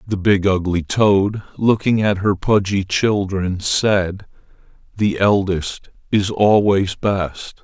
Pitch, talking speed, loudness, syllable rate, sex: 100 Hz, 120 wpm, -18 LUFS, 3.3 syllables/s, male